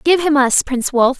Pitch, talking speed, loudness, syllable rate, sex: 280 Hz, 250 wpm, -15 LUFS, 5.3 syllables/s, female